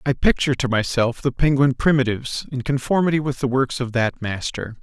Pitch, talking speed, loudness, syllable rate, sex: 130 Hz, 185 wpm, -21 LUFS, 5.6 syllables/s, male